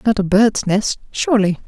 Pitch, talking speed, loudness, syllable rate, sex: 210 Hz, 180 wpm, -16 LUFS, 5.0 syllables/s, female